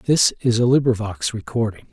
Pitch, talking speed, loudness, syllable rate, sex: 115 Hz, 155 wpm, -19 LUFS, 5.1 syllables/s, male